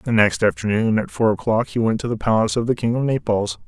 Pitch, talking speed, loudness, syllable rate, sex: 110 Hz, 260 wpm, -20 LUFS, 6.1 syllables/s, male